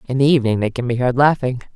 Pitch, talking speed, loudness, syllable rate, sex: 130 Hz, 275 wpm, -17 LUFS, 7.1 syllables/s, female